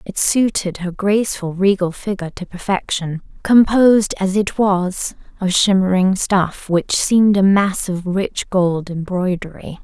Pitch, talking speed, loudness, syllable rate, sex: 190 Hz, 140 wpm, -17 LUFS, 4.2 syllables/s, female